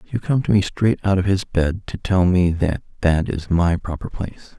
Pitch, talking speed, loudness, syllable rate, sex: 90 Hz, 235 wpm, -20 LUFS, 4.8 syllables/s, male